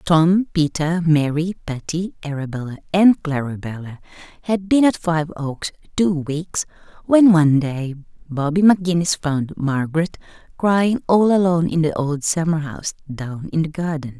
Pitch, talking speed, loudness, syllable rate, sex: 160 Hz, 135 wpm, -19 LUFS, 4.7 syllables/s, female